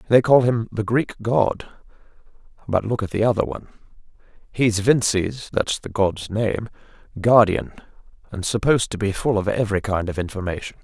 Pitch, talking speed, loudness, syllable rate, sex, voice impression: 105 Hz, 160 wpm, -21 LUFS, 5.1 syllables/s, male, very masculine, very adult-like, slightly old, very thick, slightly tensed, slightly powerful, slightly bright, slightly soft, slightly clear, slightly fluent, slightly cool, very intellectual, slightly refreshing, very sincere, very calm, mature, friendly, very reassuring, unique, elegant, slightly wild, slightly sweet, slightly lively, kind, slightly modest